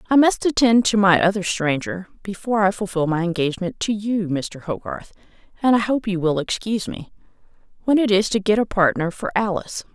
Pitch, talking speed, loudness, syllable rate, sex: 195 Hz, 195 wpm, -20 LUFS, 5.6 syllables/s, female